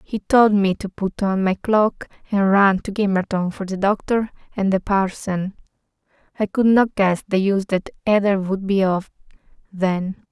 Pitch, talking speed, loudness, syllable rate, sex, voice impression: 195 Hz, 175 wpm, -20 LUFS, 4.5 syllables/s, female, feminine, slightly adult-like, calm, friendly, slightly kind